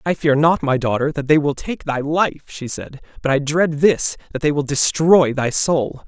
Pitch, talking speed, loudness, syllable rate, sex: 150 Hz, 215 wpm, -18 LUFS, 4.5 syllables/s, male